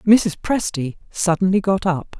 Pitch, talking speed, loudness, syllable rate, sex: 185 Hz, 135 wpm, -20 LUFS, 4.0 syllables/s, female